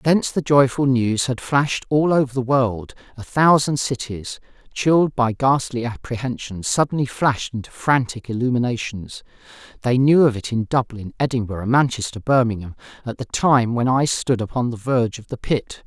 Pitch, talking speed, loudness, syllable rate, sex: 125 Hz, 165 wpm, -20 LUFS, 5.0 syllables/s, male